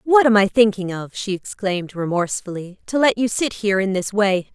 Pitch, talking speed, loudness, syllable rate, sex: 205 Hz, 210 wpm, -19 LUFS, 5.5 syllables/s, female